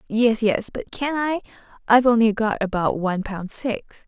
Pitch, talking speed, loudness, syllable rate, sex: 225 Hz, 175 wpm, -21 LUFS, 4.8 syllables/s, female